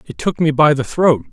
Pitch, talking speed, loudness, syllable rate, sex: 150 Hz, 275 wpm, -15 LUFS, 5.5 syllables/s, male